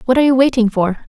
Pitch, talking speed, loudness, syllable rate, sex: 240 Hz, 260 wpm, -14 LUFS, 7.4 syllables/s, female